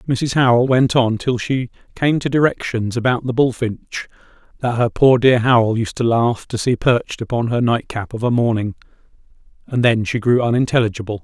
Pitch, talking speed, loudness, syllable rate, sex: 120 Hz, 180 wpm, -17 LUFS, 5.2 syllables/s, male